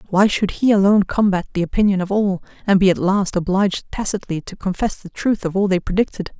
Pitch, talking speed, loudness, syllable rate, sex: 195 Hz, 215 wpm, -19 LUFS, 6.0 syllables/s, female